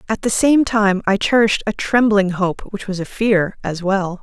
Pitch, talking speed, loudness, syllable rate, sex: 205 Hz, 215 wpm, -17 LUFS, 4.6 syllables/s, female